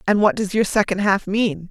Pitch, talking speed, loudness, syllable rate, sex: 200 Hz, 245 wpm, -19 LUFS, 5.2 syllables/s, female